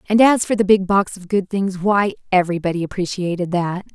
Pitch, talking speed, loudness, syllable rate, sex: 190 Hz, 200 wpm, -18 LUFS, 5.7 syllables/s, female